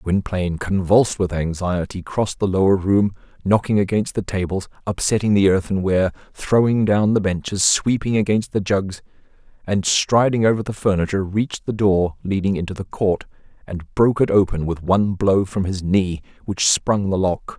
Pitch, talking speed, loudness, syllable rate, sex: 100 Hz, 165 wpm, -19 LUFS, 5.1 syllables/s, male